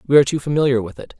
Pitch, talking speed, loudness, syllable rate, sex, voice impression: 130 Hz, 300 wpm, -18 LUFS, 8.5 syllables/s, male, very masculine, very adult-like, slightly middle-aged, very thick, tensed, powerful, bright, slightly hard, slightly muffled, fluent, very cool, intellectual, slightly refreshing, sincere, calm, very mature, slightly friendly, reassuring, wild, slightly sweet, slightly lively, slightly kind, slightly strict